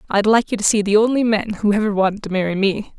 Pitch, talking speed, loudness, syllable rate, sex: 210 Hz, 280 wpm, -18 LUFS, 7.2 syllables/s, female